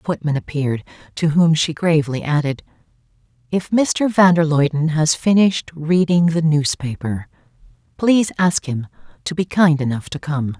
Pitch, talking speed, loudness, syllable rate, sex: 155 Hz, 155 wpm, -18 LUFS, 5.0 syllables/s, female